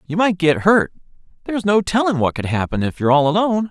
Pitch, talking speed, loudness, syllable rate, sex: 170 Hz, 225 wpm, -17 LUFS, 6.5 syllables/s, male